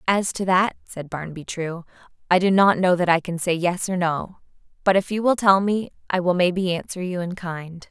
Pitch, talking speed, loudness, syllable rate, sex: 180 Hz, 230 wpm, -22 LUFS, 5.1 syllables/s, female